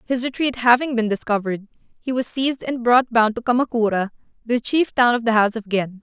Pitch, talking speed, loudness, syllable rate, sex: 235 Hz, 210 wpm, -20 LUFS, 5.9 syllables/s, female